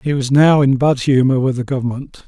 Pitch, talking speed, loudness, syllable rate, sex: 135 Hz, 235 wpm, -15 LUFS, 5.4 syllables/s, male